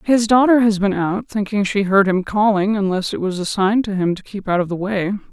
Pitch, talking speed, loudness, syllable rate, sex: 200 Hz, 260 wpm, -18 LUFS, 5.4 syllables/s, female